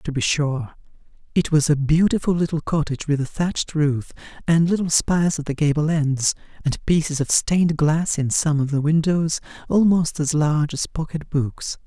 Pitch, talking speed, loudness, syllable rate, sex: 155 Hz, 180 wpm, -21 LUFS, 5.0 syllables/s, male